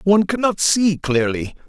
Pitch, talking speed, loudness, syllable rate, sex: 170 Hz, 145 wpm, -18 LUFS, 4.7 syllables/s, male